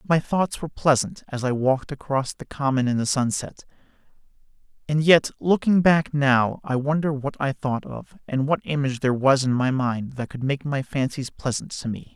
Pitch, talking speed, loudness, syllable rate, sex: 135 Hz, 195 wpm, -23 LUFS, 5.1 syllables/s, male